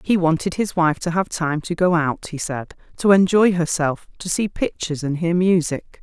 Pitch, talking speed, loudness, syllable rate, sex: 170 Hz, 210 wpm, -20 LUFS, 4.8 syllables/s, female